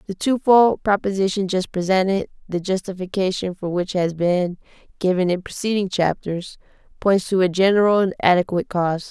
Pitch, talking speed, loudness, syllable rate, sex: 190 Hz, 150 wpm, -20 LUFS, 5.3 syllables/s, female